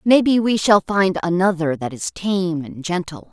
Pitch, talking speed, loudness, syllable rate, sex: 180 Hz, 180 wpm, -19 LUFS, 4.4 syllables/s, female